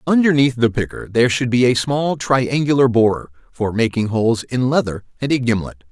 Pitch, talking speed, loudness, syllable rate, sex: 120 Hz, 185 wpm, -17 LUFS, 5.4 syllables/s, male